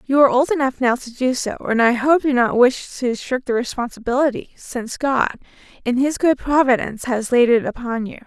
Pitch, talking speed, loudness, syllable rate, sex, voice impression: 255 Hz, 210 wpm, -19 LUFS, 5.4 syllables/s, female, very feminine, slightly young, very thin, tensed, slightly relaxed, weak, bright, soft, very clear, very fluent, slightly raspy, very cute, intellectual, very refreshing, sincere, slightly calm, very friendly, very reassuring, very elegant, slightly wild, sweet, lively, kind, slightly sharp